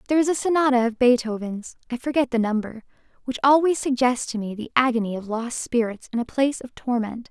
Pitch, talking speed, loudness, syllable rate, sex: 245 Hz, 205 wpm, -23 LUFS, 5.6 syllables/s, female